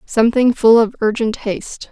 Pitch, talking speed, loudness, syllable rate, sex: 230 Hz, 155 wpm, -15 LUFS, 5.2 syllables/s, female